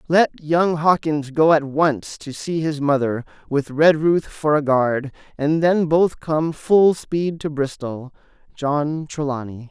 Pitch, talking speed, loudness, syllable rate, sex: 150 Hz, 155 wpm, -20 LUFS, 3.6 syllables/s, male